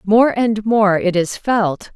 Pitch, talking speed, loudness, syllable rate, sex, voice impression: 210 Hz, 185 wpm, -16 LUFS, 3.2 syllables/s, female, feminine, adult-like, tensed, powerful, bright, clear, fluent, intellectual, calm, friendly, elegant, lively, slightly sharp